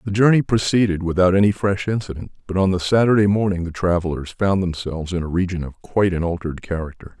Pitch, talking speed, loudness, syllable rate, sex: 95 Hz, 200 wpm, -20 LUFS, 6.4 syllables/s, male